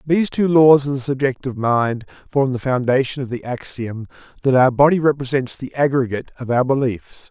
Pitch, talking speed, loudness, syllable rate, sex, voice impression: 130 Hz, 180 wpm, -18 LUFS, 5.5 syllables/s, male, masculine, adult-like, slightly muffled, slightly cool, slightly refreshing, sincere, slightly kind